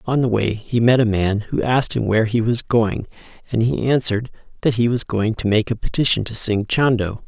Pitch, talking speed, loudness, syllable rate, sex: 115 Hz, 230 wpm, -19 LUFS, 5.5 syllables/s, male